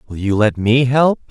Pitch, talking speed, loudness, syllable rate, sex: 120 Hz, 230 wpm, -15 LUFS, 4.7 syllables/s, male